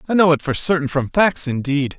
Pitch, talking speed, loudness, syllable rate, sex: 155 Hz, 240 wpm, -18 LUFS, 5.6 syllables/s, male